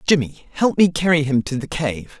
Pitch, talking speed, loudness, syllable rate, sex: 150 Hz, 220 wpm, -19 LUFS, 5.1 syllables/s, male